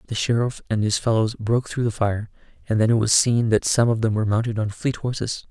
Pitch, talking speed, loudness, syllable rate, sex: 110 Hz, 250 wpm, -21 LUFS, 6.0 syllables/s, male